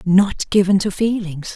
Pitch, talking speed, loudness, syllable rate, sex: 190 Hz, 155 wpm, -18 LUFS, 4.1 syllables/s, female